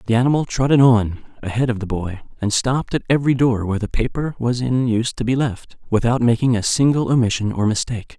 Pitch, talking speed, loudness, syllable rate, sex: 120 Hz, 220 wpm, -19 LUFS, 6.2 syllables/s, male